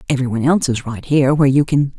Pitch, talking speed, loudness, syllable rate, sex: 135 Hz, 240 wpm, -16 LUFS, 7.9 syllables/s, female